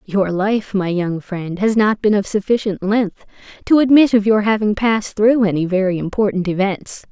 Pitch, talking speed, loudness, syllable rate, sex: 205 Hz, 185 wpm, -17 LUFS, 4.9 syllables/s, female